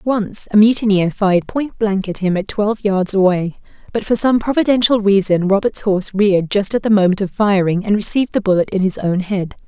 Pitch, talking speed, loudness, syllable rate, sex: 200 Hz, 210 wpm, -16 LUFS, 5.6 syllables/s, female